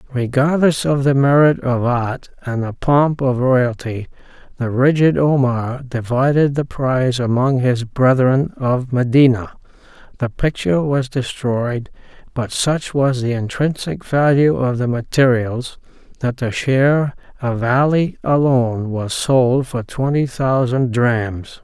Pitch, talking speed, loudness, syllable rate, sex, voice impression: 130 Hz, 130 wpm, -17 LUFS, 4.0 syllables/s, male, masculine, middle-aged, weak, halting, raspy, sincere, calm, unique, kind, modest